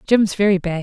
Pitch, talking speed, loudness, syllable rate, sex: 190 Hz, 220 wpm, -17 LUFS, 5.4 syllables/s, female